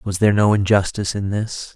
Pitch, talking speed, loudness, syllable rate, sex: 100 Hz, 205 wpm, -19 LUFS, 5.9 syllables/s, male